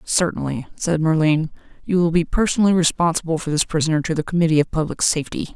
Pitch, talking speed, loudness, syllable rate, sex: 160 Hz, 185 wpm, -19 LUFS, 6.6 syllables/s, female